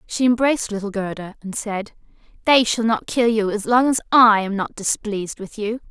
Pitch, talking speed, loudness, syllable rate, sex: 220 Hz, 205 wpm, -19 LUFS, 5.2 syllables/s, female